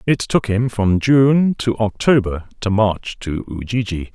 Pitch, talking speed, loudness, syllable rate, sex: 110 Hz, 160 wpm, -18 LUFS, 3.9 syllables/s, male